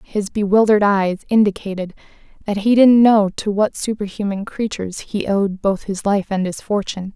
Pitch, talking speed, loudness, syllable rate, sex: 205 Hz, 170 wpm, -18 LUFS, 5.2 syllables/s, female